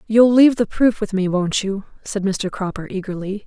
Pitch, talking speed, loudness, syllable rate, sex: 205 Hz, 210 wpm, -19 LUFS, 5.1 syllables/s, female